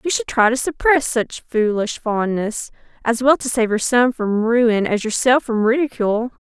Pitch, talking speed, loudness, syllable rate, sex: 235 Hz, 185 wpm, -18 LUFS, 4.6 syllables/s, female